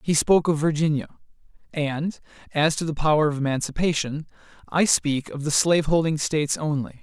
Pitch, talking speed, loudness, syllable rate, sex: 150 Hz, 160 wpm, -23 LUFS, 5.5 syllables/s, male